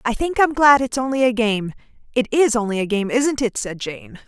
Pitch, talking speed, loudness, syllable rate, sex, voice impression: 235 Hz, 240 wpm, -19 LUFS, 5.2 syllables/s, female, very feminine, very middle-aged, very thin, very tensed, powerful, bright, hard, very clear, very fluent, raspy, slightly cool, intellectual, refreshing, slightly sincere, slightly calm, slightly friendly, slightly reassuring, very unique, elegant, wild, slightly sweet, very lively, very strict, very intense, very sharp, light